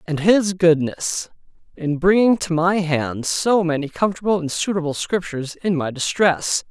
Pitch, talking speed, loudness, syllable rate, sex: 170 Hz, 150 wpm, -19 LUFS, 4.7 syllables/s, male